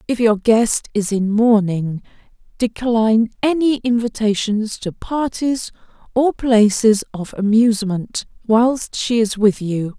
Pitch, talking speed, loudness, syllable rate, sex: 220 Hz, 120 wpm, -17 LUFS, 3.8 syllables/s, female